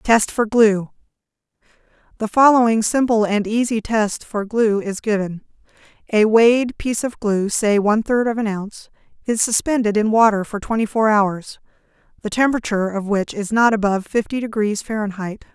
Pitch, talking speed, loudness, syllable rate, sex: 215 Hz, 160 wpm, -18 LUFS, 4.8 syllables/s, female